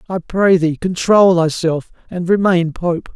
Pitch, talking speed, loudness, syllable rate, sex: 175 Hz, 150 wpm, -15 LUFS, 3.9 syllables/s, male